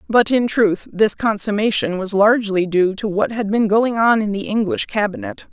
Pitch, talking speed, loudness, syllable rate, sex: 210 Hz, 195 wpm, -18 LUFS, 4.9 syllables/s, female